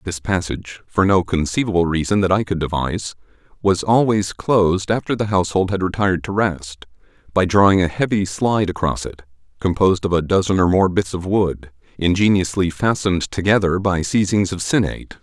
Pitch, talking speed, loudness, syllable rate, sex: 95 Hz, 170 wpm, -18 LUFS, 5.6 syllables/s, male